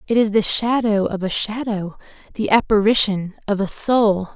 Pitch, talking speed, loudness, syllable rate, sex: 210 Hz, 165 wpm, -19 LUFS, 4.7 syllables/s, female